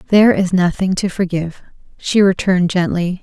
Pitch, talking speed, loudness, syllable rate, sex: 185 Hz, 150 wpm, -15 LUFS, 5.6 syllables/s, female